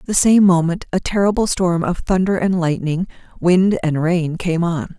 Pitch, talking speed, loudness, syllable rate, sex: 175 Hz, 180 wpm, -17 LUFS, 4.5 syllables/s, female